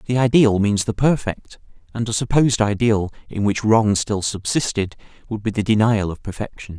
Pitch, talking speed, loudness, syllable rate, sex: 110 Hz, 175 wpm, -19 LUFS, 5.2 syllables/s, male